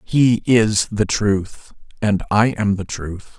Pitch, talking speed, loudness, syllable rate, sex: 105 Hz, 160 wpm, -18 LUFS, 3.2 syllables/s, male